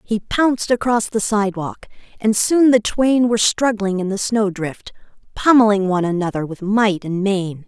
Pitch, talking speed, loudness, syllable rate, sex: 210 Hz, 165 wpm, -17 LUFS, 4.8 syllables/s, female